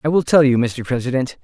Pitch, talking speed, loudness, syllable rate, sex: 135 Hz, 250 wpm, -17 LUFS, 6.1 syllables/s, male